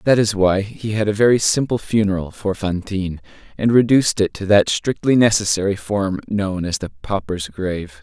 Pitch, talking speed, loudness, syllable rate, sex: 100 Hz, 180 wpm, -18 LUFS, 5.2 syllables/s, male